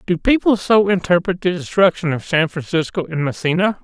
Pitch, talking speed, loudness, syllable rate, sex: 175 Hz, 170 wpm, -17 LUFS, 5.5 syllables/s, male